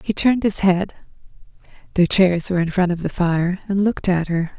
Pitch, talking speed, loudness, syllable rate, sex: 185 Hz, 185 wpm, -19 LUFS, 5.5 syllables/s, female